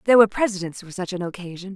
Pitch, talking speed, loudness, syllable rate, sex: 195 Hz, 240 wpm, -22 LUFS, 8.1 syllables/s, female